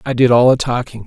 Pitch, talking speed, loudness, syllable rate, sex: 120 Hz, 280 wpm, -14 LUFS, 6.2 syllables/s, male